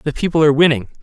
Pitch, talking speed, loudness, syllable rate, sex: 150 Hz, 235 wpm, -14 LUFS, 8.0 syllables/s, male